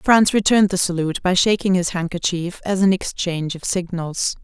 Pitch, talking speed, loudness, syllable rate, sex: 185 Hz, 175 wpm, -19 LUFS, 5.4 syllables/s, female